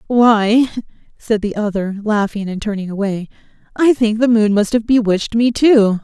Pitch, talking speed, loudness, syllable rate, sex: 215 Hz, 170 wpm, -15 LUFS, 4.8 syllables/s, female